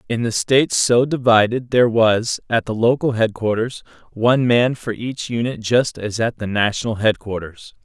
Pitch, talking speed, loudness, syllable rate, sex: 115 Hz, 170 wpm, -18 LUFS, 4.8 syllables/s, male